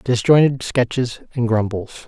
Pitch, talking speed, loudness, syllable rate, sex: 120 Hz, 115 wpm, -18 LUFS, 4.2 syllables/s, male